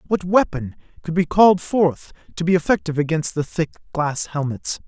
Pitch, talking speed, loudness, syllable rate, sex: 165 Hz, 170 wpm, -20 LUFS, 5.2 syllables/s, male